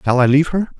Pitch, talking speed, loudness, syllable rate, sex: 145 Hz, 305 wpm, -15 LUFS, 7.7 syllables/s, male